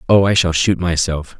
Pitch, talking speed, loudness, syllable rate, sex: 90 Hz, 215 wpm, -16 LUFS, 5.0 syllables/s, male